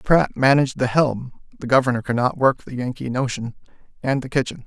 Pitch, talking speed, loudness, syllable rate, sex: 130 Hz, 195 wpm, -20 LUFS, 3.4 syllables/s, male